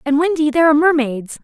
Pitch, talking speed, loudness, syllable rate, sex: 295 Hz, 210 wpm, -15 LUFS, 6.9 syllables/s, female